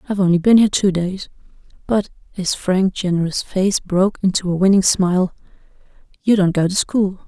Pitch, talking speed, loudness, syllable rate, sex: 190 Hz, 155 wpm, -17 LUFS, 5.6 syllables/s, female